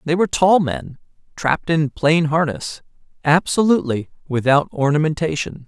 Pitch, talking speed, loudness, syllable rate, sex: 155 Hz, 115 wpm, -18 LUFS, 5.0 syllables/s, male